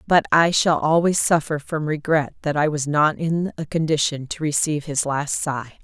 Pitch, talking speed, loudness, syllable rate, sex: 155 Hz, 195 wpm, -21 LUFS, 4.7 syllables/s, female